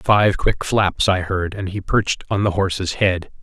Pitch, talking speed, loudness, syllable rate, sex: 95 Hz, 210 wpm, -19 LUFS, 4.3 syllables/s, male